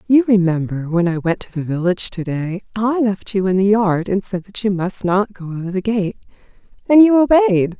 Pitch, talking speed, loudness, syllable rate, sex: 200 Hz, 230 wpm, -17 LUFS, 5.1 syllables/s, female